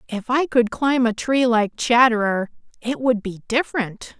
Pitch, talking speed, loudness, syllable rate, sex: 235 Hz, 170 wpm, -20 LUFS, 4.6 syllables/s, female